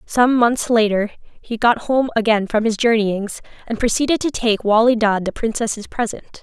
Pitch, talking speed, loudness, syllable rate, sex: 225 Hz, 175 wpm, -18 LUFS, 4.6 syllables/s, female